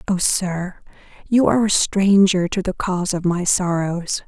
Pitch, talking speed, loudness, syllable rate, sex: 185 Hz, 170 wpm, -18 LUFS, 4.4 syllables/s, female